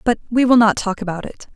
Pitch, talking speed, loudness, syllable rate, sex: 220 Hz, 270 wpm, -16 LUFS, 6.2 syllables/s, female